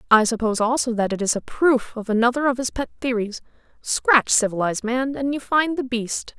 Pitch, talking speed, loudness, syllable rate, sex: 240 Hz, 205 wpm, -21 LUFS, 5.5 syllables/s, female